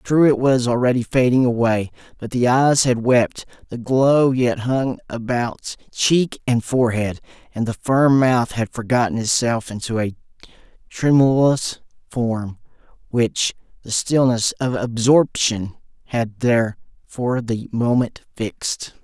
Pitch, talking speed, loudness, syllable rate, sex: 120 Hz, 130 wpm, -19 LUFS, 4.0 syllables/s, male